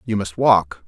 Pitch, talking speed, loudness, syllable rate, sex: 95 Hz, 205 wpm, -18 LUFS, 4.0 syllables/s, male